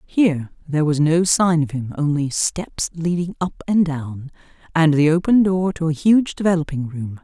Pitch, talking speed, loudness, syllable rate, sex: 160 Hz, 180 wpm, -19 LUFS, 4.7 syllables/s, female